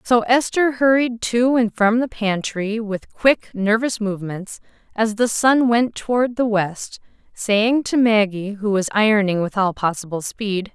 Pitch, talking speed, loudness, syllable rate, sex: 220 Hz, 160 wpm, -19 LUFS, 4.2 syllables/s, female